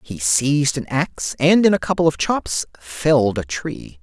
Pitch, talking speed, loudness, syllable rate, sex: 135 Hz, 195 wpm, -19 LUFS, 4.6 syllables/s, male